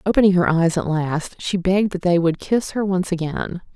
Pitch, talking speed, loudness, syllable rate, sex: 180 Hz, 225 wpm, -20 LUFS, 5.1 syllables/s, female